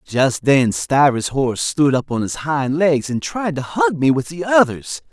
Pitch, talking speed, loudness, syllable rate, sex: 145 Hz, 210 wpm, -18 LUFS, 4.3 syllables/s, male